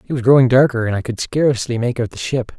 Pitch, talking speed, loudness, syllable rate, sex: 125 Hz, 280 wpm, -16 LUFS, 6.6 syllables/s, male